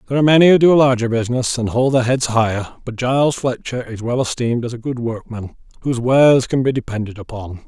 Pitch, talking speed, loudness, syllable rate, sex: 125 Hz, 225 wpm, -17 LUFS, 6.5 syllables/s, male